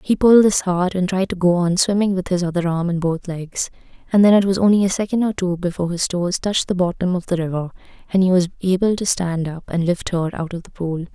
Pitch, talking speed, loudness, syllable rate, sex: 180 Hz, 265 wpm, -19 LUFS, 6.0 syllables/s, female